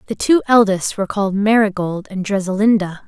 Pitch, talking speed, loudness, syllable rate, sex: 200 Hz, 155 wpm, -16 LUFS, 5.7 syllables/s, female